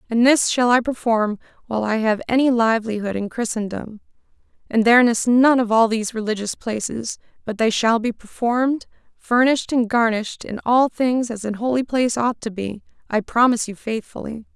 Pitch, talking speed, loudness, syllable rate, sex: 230 Hz, 185 wpm, -20 LUFS, 5.6 syllables/s, female